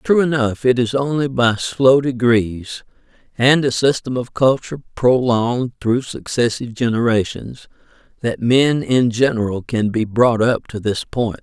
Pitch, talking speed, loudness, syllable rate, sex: 120 Hz, 145 wpm, -17 LUFS, 4.3 syllables/s, male